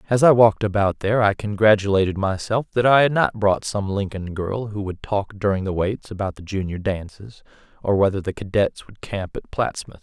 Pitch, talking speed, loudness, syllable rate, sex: 100 Hz, 205 wpm, -21 LUFS, 5.4 syllables/s, male